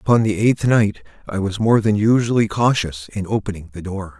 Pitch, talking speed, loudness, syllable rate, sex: 105 Hz, 200 wpm, -19 LUFS, 5.3 syllables/s, male